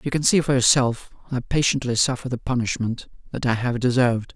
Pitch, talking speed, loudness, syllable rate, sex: 125 Hz, 180 wpm, -21 LUFS, 5.8 syllables/s, male